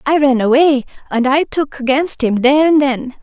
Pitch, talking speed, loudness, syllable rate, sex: 275 Hz, 205 wpm, -14 LUFS, 5.0 syllables/s, female